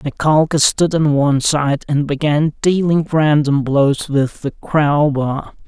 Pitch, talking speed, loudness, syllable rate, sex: 145 Hz, 135 wpm, -15 LUFS, 3.8 syllables/s, male